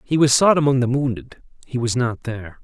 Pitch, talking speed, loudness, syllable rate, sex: 125 Hz, 230 wpm, -19 LUFS, 5.7 syllables/s, male